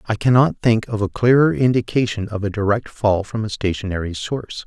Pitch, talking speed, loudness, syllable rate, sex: 110 Hz, 195 wpm, -19 LUFS, 5.6 syllables/s, male